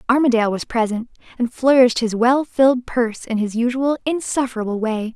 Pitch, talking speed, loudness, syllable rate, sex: 240 Hz, 165 wpm, -19 LUFS, 5.9 syllables/s, female